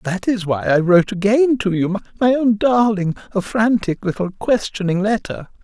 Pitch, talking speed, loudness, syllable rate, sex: 205 Hz, 160 wpm, -18 LUFS, 4.9 syllables/s, male